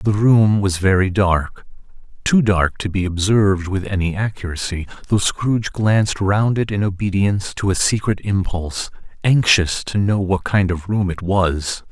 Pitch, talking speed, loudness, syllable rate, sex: 100 Hz, 165 wpm, -18 LUFS, 4.6 syllables/s, male